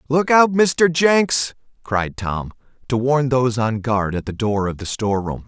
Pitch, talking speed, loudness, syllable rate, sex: 125 Hz, 185 wpm, -19 LUFS, 4.3 syllables/s, male